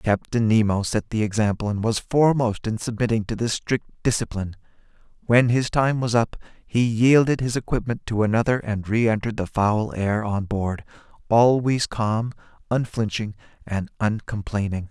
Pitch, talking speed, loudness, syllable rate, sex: 110 Hz, 150 wpm, -22 LUFS, 4.9 syllables/s, male